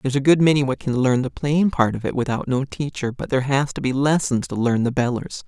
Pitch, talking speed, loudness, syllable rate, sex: 135 Hz, 275 wpm, -21 LUFS, 5.9 syllables/s, male